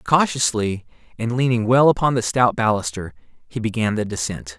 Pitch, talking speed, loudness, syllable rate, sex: 115 Hz, 155 wpm, -20 LUFS, 5.1 syllables/s, male